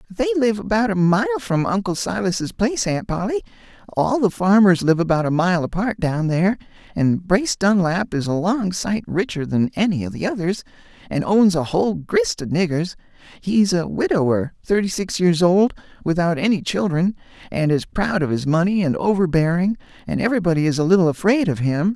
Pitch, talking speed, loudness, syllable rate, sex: 180 Hz, 180 wpm, -20 LUFS, 5.3 syllables/s, male